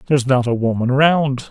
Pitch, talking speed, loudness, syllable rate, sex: 130 Hz, 200 wpm, -16 LUFS, 5.3 syllables/s, male